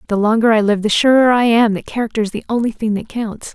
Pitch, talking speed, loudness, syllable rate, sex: 220 Hz, 270 wpm, -15 LUFS, 6.4 syllables/s, female